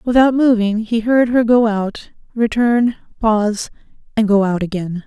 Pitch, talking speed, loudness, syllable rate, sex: 220 Hz, 155 wpm, -16 LUFS, 4.5 syllables/s, female